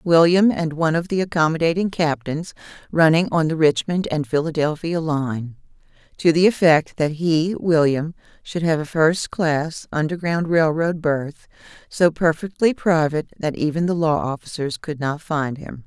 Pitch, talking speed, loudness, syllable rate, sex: 160 Hz, 155 wpm, -20 LUFS, 4.6 syllables/s, female